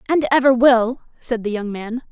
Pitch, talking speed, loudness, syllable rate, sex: 240 Hz, 200 wpm, -18 LUFS, 4.9 syllables/s, female